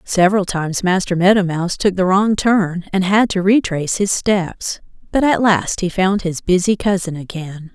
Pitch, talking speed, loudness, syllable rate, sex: 185 Hz, 185 wpm, -17 LUFS, 4.8 syllables/s, female